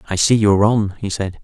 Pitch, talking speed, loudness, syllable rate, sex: 100 Hz, 250 wpm, -16 LUFS, 5.4 syllables/s, male